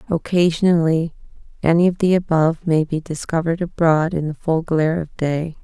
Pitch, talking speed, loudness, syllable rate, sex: 165 Hz, 160 wpm, -19 LUFS, 5.5 syllables/s, female